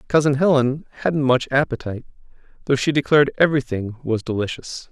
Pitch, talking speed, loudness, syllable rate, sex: 135 Hz, 135 wpm, -20 LUFS, 6.0 syllables/s, male